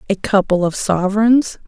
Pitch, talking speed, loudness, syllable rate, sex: 200 Hz, 145 wpm, -16 LUFS, 4.9 syllables/s, female